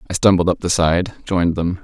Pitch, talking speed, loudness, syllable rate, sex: 90 Hz, 230 wpm, -17 LUFS, 6.0 syllables/s, male